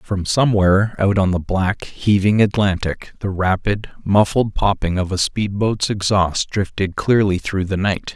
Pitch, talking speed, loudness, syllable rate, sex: 100 Hz, 160 wpm, -18 LUFS, 4.4 syllables/s, male